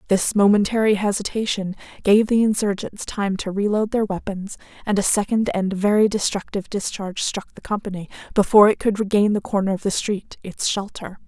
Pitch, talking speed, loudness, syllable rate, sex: 205 Hz, 175 wpm, -21 LUFS, 5.5 syllables/s, female